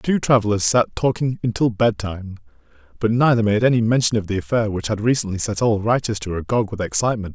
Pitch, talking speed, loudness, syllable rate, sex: 110 Hz, 190 wpm, -19 LUFS, 6.3 syllables/s, male